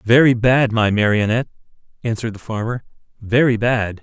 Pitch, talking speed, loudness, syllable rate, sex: 115 Hz, 135 wpm, -18 LUFS, 5.6 syllables/s, male